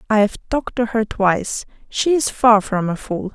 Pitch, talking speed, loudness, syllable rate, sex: 220 Hz, 200 wpm, -19 LUFS, 5.1 syllables/s, female